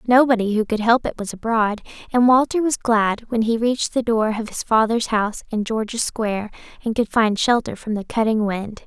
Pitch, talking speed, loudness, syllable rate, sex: 225 Hz, 210 wpm, -20 LUFS, 5.3 syllables/s, female